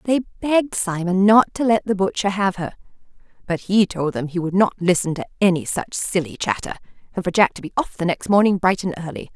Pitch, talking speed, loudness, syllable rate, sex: 190 Hz, 225 wpm, -20 LUFS, 5.7 syllables/s, female